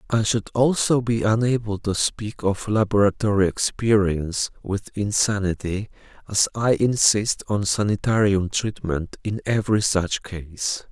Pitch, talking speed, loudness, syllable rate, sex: 105 Hz, 120 wpm, -22 LUFS, 4.3 syllables/s, male